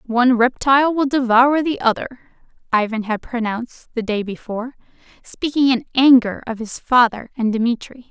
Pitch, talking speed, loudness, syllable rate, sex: 240 Hz, 150 wpm, -18 LUFS, 4.9 syllables/s, female